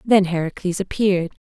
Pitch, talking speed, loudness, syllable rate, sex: 185 Hz, 120 wpm, -21 LUFS, 5.7 syllables/s, female